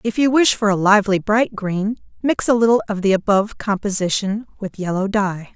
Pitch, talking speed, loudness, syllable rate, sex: 205 Hz, 195 wpm, -18 LUFS, 5.4 syllables/s, female